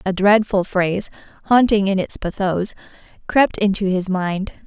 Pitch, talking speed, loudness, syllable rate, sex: 195 Hz, 140 wpm, -18 LUFS, 4.5 syllables/s, female